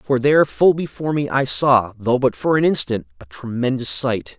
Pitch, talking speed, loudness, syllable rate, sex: 130 Hz, 205 wpm, -18 LUFS, 5.1 syllables/s, male